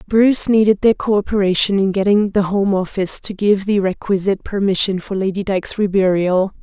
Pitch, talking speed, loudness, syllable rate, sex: 195 Hz, 165 wpm, -16 LUFS, 5.6 syllables/s, female